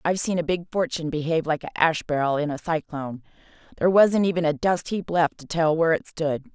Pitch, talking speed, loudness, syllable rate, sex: 160 Hz, 220 wpm, -23 LUFS, 6.3 syllables/s, female